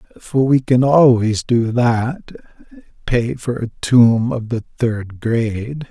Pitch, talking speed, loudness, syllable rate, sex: 120 Hz, 130 wpm, -16 LUFS, 3.5 syllables/s, male